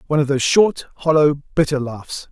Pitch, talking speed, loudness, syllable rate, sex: 145 Hz, 180 wpm, -18 LUFS, 5.7 syllables/s, male